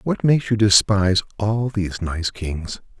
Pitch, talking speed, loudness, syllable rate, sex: 100 Hz, 160 wpm, -20 LUFS, 4.7 syllables/s, male